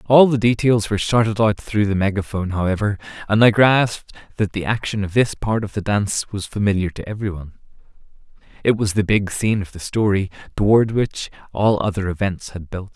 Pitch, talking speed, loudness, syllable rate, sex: 105 Hz, 190 wpm, -19 LUFS, 5.8 syllables/s, male